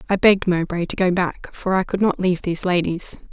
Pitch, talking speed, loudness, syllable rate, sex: 180 Hz, 235 wpm, -20 LUFS, 6.0 syllables/s, female